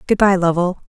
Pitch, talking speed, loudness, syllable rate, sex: 185 Hz, 200 wpm, -16 LUFS, 5.6 syllables/s, female